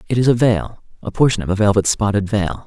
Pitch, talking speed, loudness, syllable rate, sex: 105 Hz, 225 wpm, -17 LUFS, 6.1 syllables/s, male